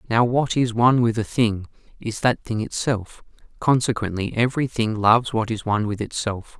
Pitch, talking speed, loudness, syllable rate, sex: 115 Hz, 180 wpm, -21 LUFS, 5.3 syllables/s, male